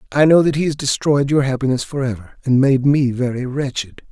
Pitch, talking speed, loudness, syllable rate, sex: 135 Hz, 220 wpm, -17 LUFS, 5.5 syllables/s, male